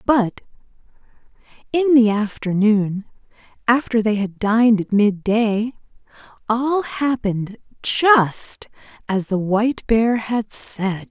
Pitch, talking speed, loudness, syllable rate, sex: 220 Hz, 105 wpm, -19 LUFS, 3.5 syllables/s, female